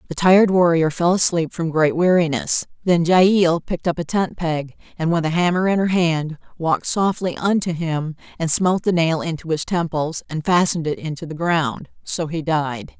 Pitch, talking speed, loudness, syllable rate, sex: 165 Hz, 185 wpm, -19 LUFS, 4.9 syllables/s, female